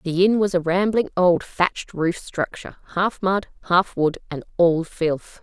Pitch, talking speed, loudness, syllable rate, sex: 180 Hz, 175 wpm, -21 LUFS, 4.5 syllables/s, female